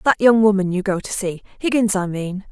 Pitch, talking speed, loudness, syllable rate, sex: 200 Hz, 215 wpm, -19 LUFS, 5.4 syllables/s, female